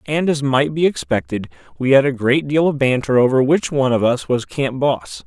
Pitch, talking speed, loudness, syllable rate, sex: 130 Hz, 230 wpm, -17 LUFS, 5.1 syllables/s, male